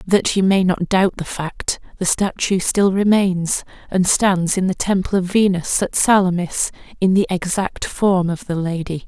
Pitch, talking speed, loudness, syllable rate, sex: 185 Hz, 180 wpm, -18 LUFS, 4.3 syllables/s, female